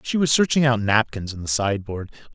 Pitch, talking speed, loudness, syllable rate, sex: 115 Hz, 205 wpm, -21 LUFS, 5.9 syllables/s, male